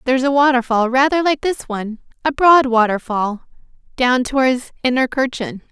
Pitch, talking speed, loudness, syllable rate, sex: 255 Hz, 125 wpm, -16 LUFS, 5.4 syllables/s, female